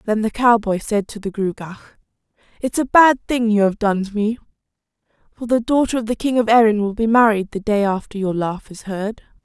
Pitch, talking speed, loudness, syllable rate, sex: 215 Hz, 215 wpm, -18 LUFS, 5.5 syllables/s, female